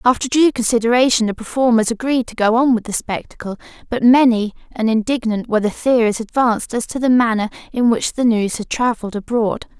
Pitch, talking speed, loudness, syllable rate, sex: 235 Hz, 190 wpm, -17 LUFS, 5.9 syllables/s, female